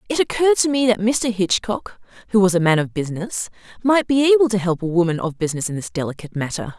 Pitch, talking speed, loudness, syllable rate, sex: 205 Hz, 230 wpm, -19 LUFS, 6.6 syllables/s, female